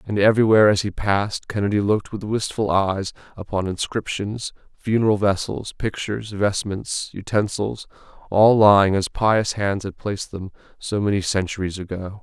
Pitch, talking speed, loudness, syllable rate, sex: 100 Hz, 140 wpm, -21 LUFS, 5.1 syllables/s, male